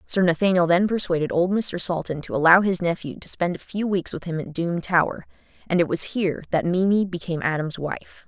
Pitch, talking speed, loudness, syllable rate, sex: 175 Hz, 220 wpm, -23 LUFS, 5.6 syllables/s, female